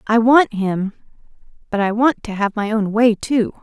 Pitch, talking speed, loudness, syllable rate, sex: 220 Hz, 200 wpm, -17 LUFS, 4.5 syllables/s, female